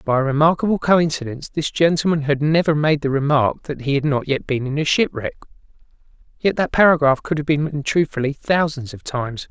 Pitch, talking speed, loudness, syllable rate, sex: 150 Hz, 195 wpm, -19 LUFS, 5.9 syllables/s, male